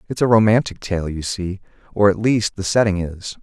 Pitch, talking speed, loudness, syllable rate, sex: 100 Hz, 210 wpm, -19 LUFS, 5.6 syllables/s, male